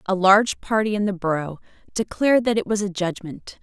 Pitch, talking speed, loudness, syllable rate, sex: 200 Hz, 200 wpm, -21 LUFS, 5.7 syllables/s, female